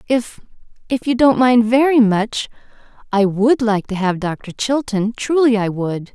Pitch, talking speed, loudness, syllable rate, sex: 225 Hz, 145 wpm, -17 LUFS, 4.1 syllables/s, female